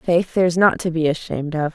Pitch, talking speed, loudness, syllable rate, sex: 165 Hz, 240 wpm, -19 LUFS, 5.7 syllables/s, female